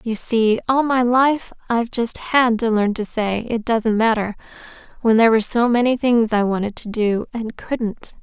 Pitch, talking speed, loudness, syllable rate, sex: 230 Hz, 190 wpm, -19 LUFS, 4.7 syllables/s, female